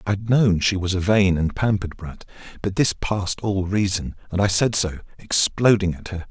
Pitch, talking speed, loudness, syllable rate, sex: 95 Hz, 200 wpm, -21 LUFS, 4.9 syllables/s, male